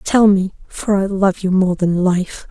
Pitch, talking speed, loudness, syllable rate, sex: 190 Hz, 215 wpm, -16 LUFS, 3.9 syllables/s, female